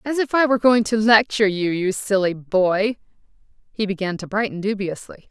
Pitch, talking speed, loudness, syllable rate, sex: 205 Hz, 180 wpm, -20 LUFS, 5.4 syllables/s, female